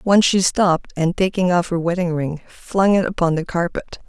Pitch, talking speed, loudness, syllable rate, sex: 175 Hz, 205 wpm, -19 LUFS, 5.1 syllables/s, female